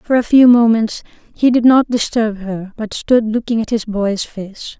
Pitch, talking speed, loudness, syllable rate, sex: 225 Hz, 200 wpm, -15 LUFS, 4.2 syllables/s, female